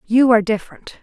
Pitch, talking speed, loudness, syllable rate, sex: 225 Hz, 175 wpm, -16 LUFS, 6.6 syllables/s, female